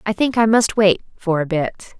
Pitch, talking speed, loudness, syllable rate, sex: 200 Hz, 240 wpm, -18 LUFS, 4.7 syllables/s, female